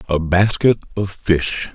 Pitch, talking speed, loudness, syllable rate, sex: 95 Hz, 135 wpm, -18 LUFS, 3.7 syllables/s, male